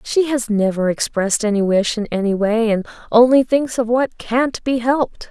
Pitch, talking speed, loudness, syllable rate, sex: 230 Hz, 190 wpm, -17 LUFS, 4.8 syllables/s, female